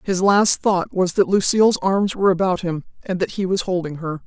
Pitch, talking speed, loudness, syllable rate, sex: 185 Hz, 225 wpm, -19 LUFS, 5.3 syllables/s, female